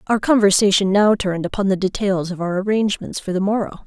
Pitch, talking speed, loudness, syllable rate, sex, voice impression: 200 Hz, 200 wpm, -18 LUFS, 6.3 syllables/s, female, very feminine, very adult-like, thin, tensed, powerful, bright, hard, very soft, slightly cute, cool, very refreshing, sincere, very calm, very friendly, very reassuring, unique, very elegant, very wild, lively, very kind